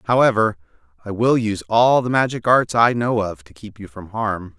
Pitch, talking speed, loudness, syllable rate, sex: 110 Hz, 210 wpm, -18 LUFS, 5.2 syllables/s, male